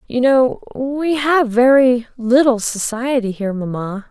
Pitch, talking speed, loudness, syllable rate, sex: 245 Hz, 130 wpm, -16 LUFS, 4.1 syllables/s, female